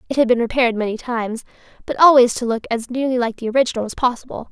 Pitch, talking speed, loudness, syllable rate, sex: 240 Hz, 225 wpm, -18 LUFS, 7.3 syllables/s, female